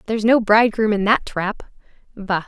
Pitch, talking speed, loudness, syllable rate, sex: 210 Hz, 145 wpm, -18 LUFS, 5.8 syllables/s, female